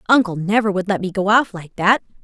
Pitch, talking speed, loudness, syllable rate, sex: 200 Hz, 240 wpm, -18 LUFS, 6.1 syllables/s, female